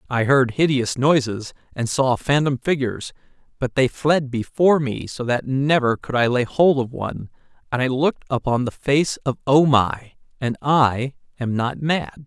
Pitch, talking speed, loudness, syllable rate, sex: 130 Hz, 175 wpm, -20 LUFS, 4.5 syllables/s, male